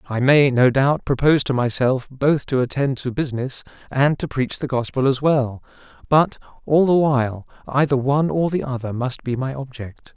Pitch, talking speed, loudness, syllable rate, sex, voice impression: 135 Hz, 190 wpm, -20 LUFS, 5.1 syllables/s, male, masculine, adult-like, tensed, bright, slightly soft, fluent, cool, intellectual, slightly sincere, friendly, wild, lively